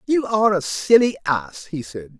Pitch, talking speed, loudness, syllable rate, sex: 175 Hz, 190 wpm, -19 LUFS, 4.7 syllables/s, male